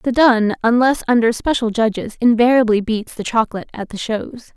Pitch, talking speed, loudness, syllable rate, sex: 230 Hz, 170 wpm, -17 LUFS, 5.3 syllables/s, female